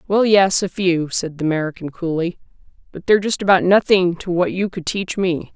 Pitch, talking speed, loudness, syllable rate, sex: 180 Hz, 205 wpm, -18 LUFS, 5.3 syllables/s, female